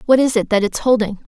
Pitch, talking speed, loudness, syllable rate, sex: 230 Hz, 275 wpm, -16 LUFS, 6.3 syllables/s, female